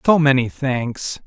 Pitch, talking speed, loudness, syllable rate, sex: 135 Hz, 145 wpm, -19 LUFS, 3.5 syllables/s, male